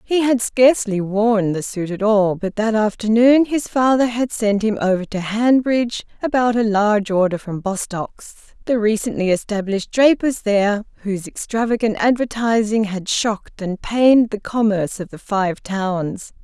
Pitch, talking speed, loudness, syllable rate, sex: 215 Hz, 155 wpm, -18 LUFS, 4.8 syllables/s, female